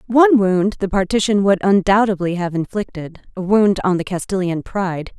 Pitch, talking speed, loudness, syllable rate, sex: 195 Hz, 160 wpm, -17 LUFS, 5.2 syllables/s, female